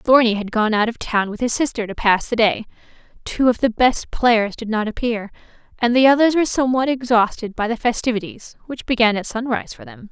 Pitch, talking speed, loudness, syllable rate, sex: 230 Hz, 215 wpm, -18 LUFS, 5.8 syllables/s, female